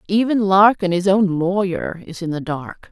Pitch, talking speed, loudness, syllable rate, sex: 190 Hz, 185 wpm, -18 LUFS, 4.4 syllables/s, female